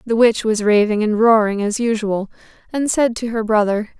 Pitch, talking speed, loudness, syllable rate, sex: 220 Hz, 195 wpm, -17 LUFS, 5.0 syllables/s, female